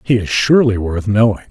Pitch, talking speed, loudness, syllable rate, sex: 110 Hz, 200 wpm, -14 LUFS, 5.9 syllables/s, male